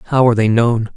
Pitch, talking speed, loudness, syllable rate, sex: 115 Hz, 250 wpm, -14 LUFS, 5.6 syllables/s, male